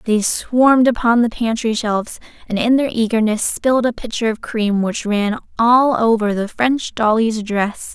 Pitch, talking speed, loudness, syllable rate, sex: 225 Hz, 175 wpm, -17 LUFS, 4.5 syllables/s, female